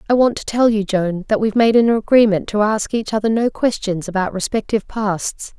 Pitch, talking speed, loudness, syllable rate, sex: 210 Hz, 215 wpm, -17 LUFS, 5.4 syllables/s, female